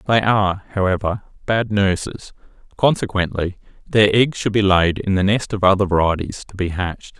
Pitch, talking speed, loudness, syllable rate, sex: 100 Hz, 165 wpm, -18 LUFS, 5.2 syllables/s, male